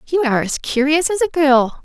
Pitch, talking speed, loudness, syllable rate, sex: 285 Hz, 230 wpm, -16 LUFS, 5.7 syllables/s, female